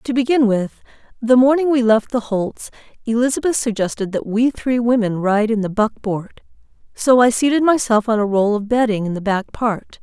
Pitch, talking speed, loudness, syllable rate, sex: 230 Hz, 190 wpm, -17 LUFS, 5.1 syllables/s, female